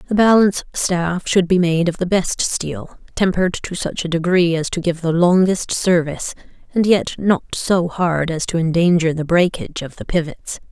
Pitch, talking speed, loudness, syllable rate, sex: 175 Hz, 190 wpm, -18 LUFS, 4.9 syllables/s, female